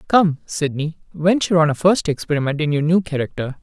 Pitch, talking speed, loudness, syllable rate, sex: 160 Hz, 180 wpm, -19 LUFS, 5.9 syllables/s, male